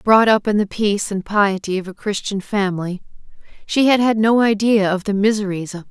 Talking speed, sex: 215 wpm, female